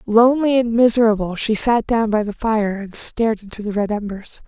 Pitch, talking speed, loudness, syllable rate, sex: 220 Hz, 200 wpm, -18 LUFS, 5.3 syllables/s, female